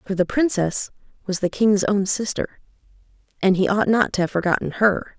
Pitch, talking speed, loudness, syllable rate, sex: 200 Hz, 185 wpm, -21 LUFS, 5.2 syllables/s, female